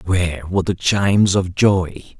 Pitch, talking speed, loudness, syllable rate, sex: 90 Hz, 165 wpm, -17 LUFS, 4.4 syllables/s, male